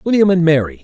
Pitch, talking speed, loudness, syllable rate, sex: 160 Hz, 215 wpm, -13 LUFS, 6.9 syllables/s, male